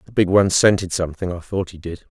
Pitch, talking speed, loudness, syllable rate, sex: 90 Hz, 250 wpm, -19 LUFS, 6.6 syllables/s, male